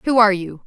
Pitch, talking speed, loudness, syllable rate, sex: 205 Hz, 270 wpm, -17 LUFS, 7.6 syllables/s, female